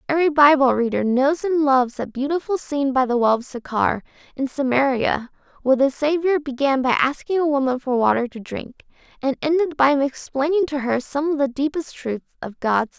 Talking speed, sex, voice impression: 195 wpm, female, feminine, slightly adult-like, slightly cute, refreshing, friendly, slightly kind